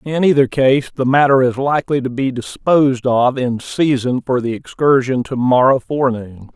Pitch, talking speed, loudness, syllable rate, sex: 130 Hz, 175 wpm, -15 LUFS, 4.9 syllables/s, male